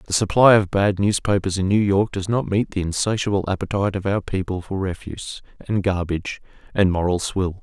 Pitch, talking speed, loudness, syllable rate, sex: 95 Hz, 190 wpm, -21 LUFS, 5.6 syllables/s, male